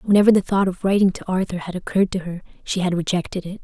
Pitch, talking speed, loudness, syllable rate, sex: 185 Hz, 250 wpm, -20 LUFS, 6.8 syllables/s, female